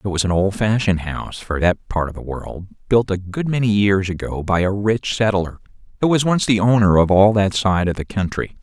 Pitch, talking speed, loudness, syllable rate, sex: 100 Hz, 230 wpm, -18 LUFS, 5.4 syllables/s, male